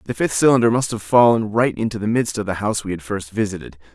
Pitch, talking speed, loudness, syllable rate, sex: 105 Hz, 260 wpm, -19 LUFS, 6.6 syllables/s, male